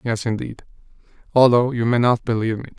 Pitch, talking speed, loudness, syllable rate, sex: 120 Hz, 195 wpm, -19 LUFS, 6.8 syllables/s, male